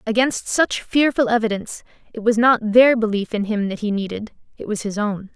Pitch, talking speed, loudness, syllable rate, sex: 220 Hz, 200 wpm, -19 LUFS, 5.4 syllables/s, female